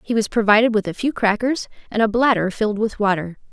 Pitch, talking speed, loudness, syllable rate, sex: 215 Hz, 220 wpm, -19 LUFS, 6.1 syllables/s, female